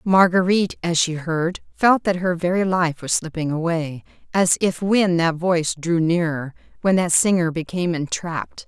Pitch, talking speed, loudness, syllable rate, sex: 170 Hz, 165 wpm, -20 LUFS, 4.8 syllables/s, female